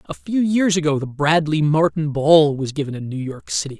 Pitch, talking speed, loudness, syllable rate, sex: 150 Hz, 220 wpm, -19 LUFS, 5.2 syllables/s, male